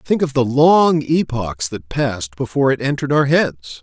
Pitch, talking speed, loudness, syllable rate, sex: 135 Hz, 190 wpm, -17 LUFS, 4.8 syllables/s, male